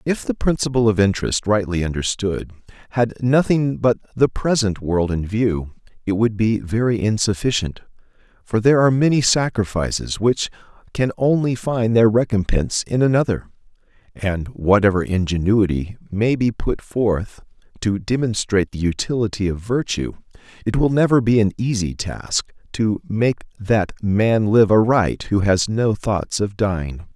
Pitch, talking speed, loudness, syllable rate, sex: 110 Hz, 145 wpm, -19 LUFS, 4.7 syllables/s, male